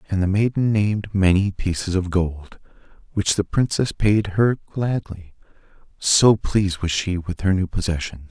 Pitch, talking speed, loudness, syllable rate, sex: 95 Hz, 160 wpm, -21 LUFS, 4.6 syllables/s, male